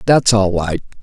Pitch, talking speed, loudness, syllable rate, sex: 105 Hz, 175 wpm, -15 LUFS, 4.4 syllables/s, male